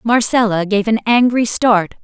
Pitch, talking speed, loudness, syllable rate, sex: 220 Hz, 150 wpm, -14 LUFS, 4.3 syllables/s, female